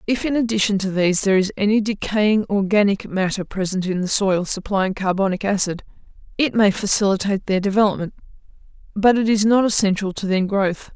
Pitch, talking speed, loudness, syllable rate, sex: 200 Hz, 170 wpm, -19 LUFS, 5.7 syllables/s, female